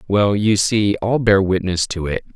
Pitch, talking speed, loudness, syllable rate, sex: 100 Hz, 205 wpm, -17 LUFS, 4.4 syllables/s, male